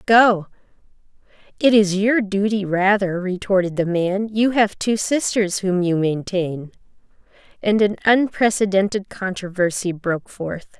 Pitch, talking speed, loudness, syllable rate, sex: 195 Hz, 110 wpm, -19 LUFS, 4.3 syllables/s, female